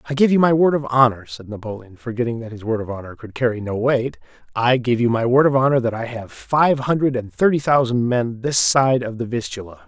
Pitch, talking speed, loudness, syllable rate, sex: 125 Hz, 235 wpm, -19 LUFS, 5.7 syllables/s, male